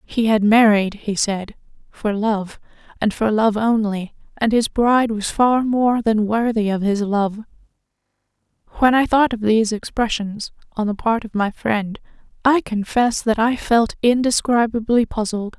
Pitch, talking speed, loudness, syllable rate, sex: 220 Hz, 160 wpm, -19 LUFS, 4.3 syllables/s, female